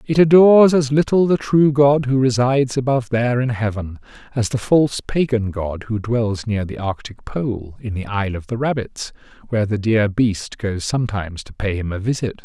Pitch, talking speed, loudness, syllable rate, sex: 120 Hz, 200 wpm, -18 LUFS, 5.3 syllables/s, male